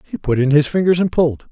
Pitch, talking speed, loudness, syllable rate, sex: 150 Hz, 280 wpm, -16 LUFS, 7.0 syllables/s, male